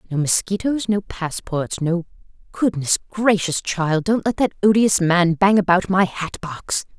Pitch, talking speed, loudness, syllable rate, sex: 185 Hz, 145 wpm, -19 LUFS, 4.2 syllables/s, female